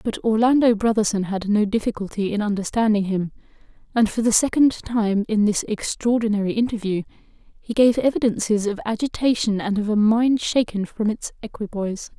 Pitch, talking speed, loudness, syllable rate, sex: 215 Hz, 155 wpm, -21 LUFS, 5.2 syllables/s, female